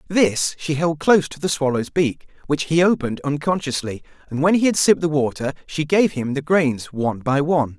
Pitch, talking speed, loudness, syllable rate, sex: 150 Hz, 210 wpm, -20 LUFS, 5.5 syllables/s, male